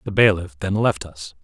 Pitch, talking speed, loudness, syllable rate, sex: 95 Hz, 210 wpm, -20 LUFS, 5.0 syllables/s, male